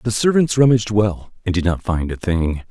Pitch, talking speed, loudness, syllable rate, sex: 105 Hz, 220 wpm, -18 LUFS, 5.3 syllables/s, male